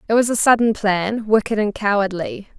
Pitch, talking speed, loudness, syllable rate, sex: 210 Hz, 185 wpm, -18 LUFS, 5.1 syllables/s, female